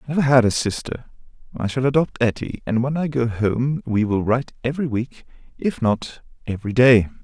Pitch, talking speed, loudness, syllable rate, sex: 125 Hz, 190 wpm, -21 LUFS, 5.6 syllables/s, male